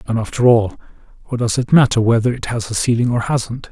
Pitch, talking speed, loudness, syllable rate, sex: 115 Hz, 225 wpm, -16 LUFS, 5.9 syllables/s, male